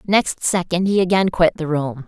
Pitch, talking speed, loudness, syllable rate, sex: 175 Hz, 200 wpm, -18 LUFS, 4.9 syllables/s, female